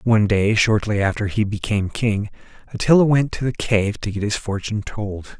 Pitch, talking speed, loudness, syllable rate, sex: 105 Hz, 190 wpm, -20 LUFS, 5.4 syllables/s, male